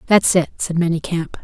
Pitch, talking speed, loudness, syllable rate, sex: 170 Hz, 165 wpm, -18 LUFS, 5.8 syllables/s, female